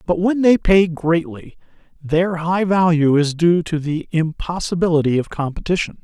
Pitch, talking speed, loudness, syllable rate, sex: 170 Hz, 150 wpm, -18 LUFS, 4.6 syllables/s, male